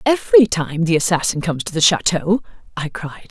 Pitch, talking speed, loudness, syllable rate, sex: 180 Hz, 180 wpm, -17 LUFS, 5.6 syllables/s, female